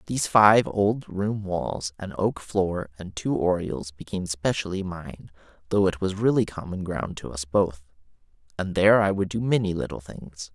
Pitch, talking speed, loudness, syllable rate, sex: 90 Hz, 175 wpm, -25 LUFS, 4.6 syllables/s, male